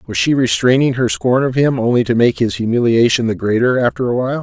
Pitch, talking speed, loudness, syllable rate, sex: 125 Hz, 230 wpm, -15 LUFS, 6.1 syllables/s, male